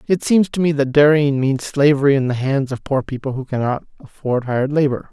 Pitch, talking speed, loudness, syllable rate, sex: 140 Hz, 225 wpm, -17 LUFS, 5.6 syllables/s, male